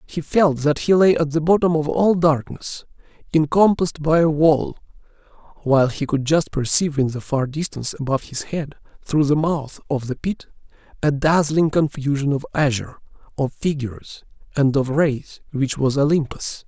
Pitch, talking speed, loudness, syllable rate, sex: 150 Hz, 165 wpm, -20 LUFS, 5.0 syllables/s, male